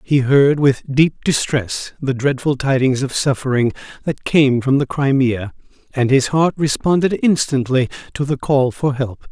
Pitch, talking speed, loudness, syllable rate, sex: 135 Hz, 160 wpm, -17 LUFS, 4.3 syllables/s, male